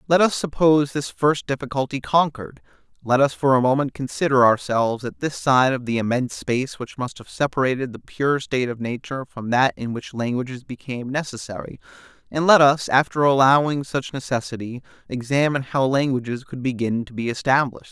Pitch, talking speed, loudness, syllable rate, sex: 130 Hz, 175 wpm, -21 LUFS, 5.7 syllables/s, male